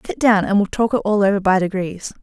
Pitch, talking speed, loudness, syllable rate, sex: 200 Hz, 270 wpm, -18 LUFS, 5.9 syllables/s, female